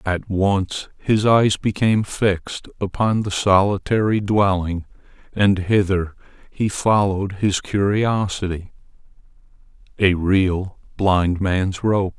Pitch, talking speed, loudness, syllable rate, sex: 100 Hz, 100 wpm, -19 LUFS, 3.7 syllables/s, male